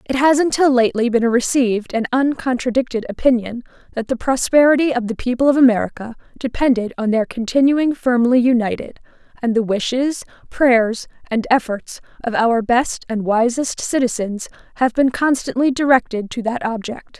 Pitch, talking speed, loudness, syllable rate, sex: 245 Hz, 150 wpm, -17 LUFS, 5.2 syllables/s, female